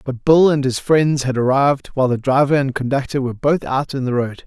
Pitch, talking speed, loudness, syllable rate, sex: 135 Hz, 240 wpm, -17 LUFS, 5.8 syllables/s, male